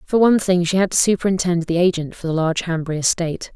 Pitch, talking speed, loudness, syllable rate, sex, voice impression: 175 Hz, 235 wpm, -19 LUFS, 7.0 syllables/s, female, very feminine, adult-like, slightly thin, tensed, slightly powerful, dark, hard, very clear, very fluent, slightly raspy, very cool, very intellectual, very refreshing, sincere, calm, very friendly, very reassuring, unique, very elegant, wild, sweet, slightly lively, slightly strict, slightly sharp